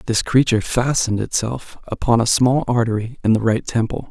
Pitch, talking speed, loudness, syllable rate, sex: 115 Hz, 175 wpm, -18 LUFS, 5.5 syllables/s, male